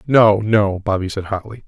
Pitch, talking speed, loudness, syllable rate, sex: 105 Hz, 180 wpm, -17 LUFS, 4.8 syllables/s, male